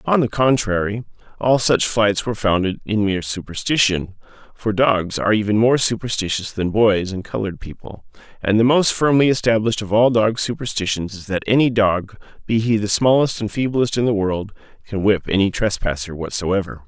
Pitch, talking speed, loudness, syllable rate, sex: 105 Hz, 165 wpm, -19 LUFS, 5.4 syllables/s, male